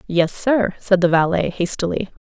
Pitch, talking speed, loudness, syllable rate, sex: 185 Hz, 160 wpm, -19 LUFS, 4.6 syllables/s, female